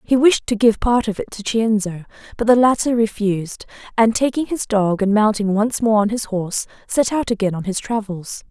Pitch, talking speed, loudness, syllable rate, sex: 220 Hz, 210 wpm, -18 LUFS, 5.2 syllables/s, female